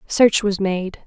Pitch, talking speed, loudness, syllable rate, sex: 200 Hz, 170 wpm, -18 LUFS, 3.3 syllables/s, female